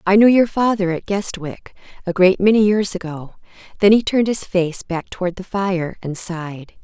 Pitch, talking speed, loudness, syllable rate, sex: 190 Hz, 195 wpm, -18 LUFS, 5.0 syllables/s, female